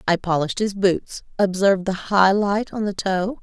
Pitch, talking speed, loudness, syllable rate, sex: 195 Hz, 175 wpm, -20 LUFS, 4.8 syllables/s, female